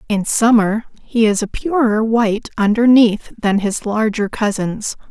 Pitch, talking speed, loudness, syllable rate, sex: 220 Hz, 140 wpm, -16 LUFS, 4.2 syllables/s, female